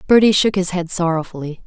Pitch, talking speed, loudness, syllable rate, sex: 180 Hz, 180 wpm, -17 LUFS, 6.0 syllables/s, female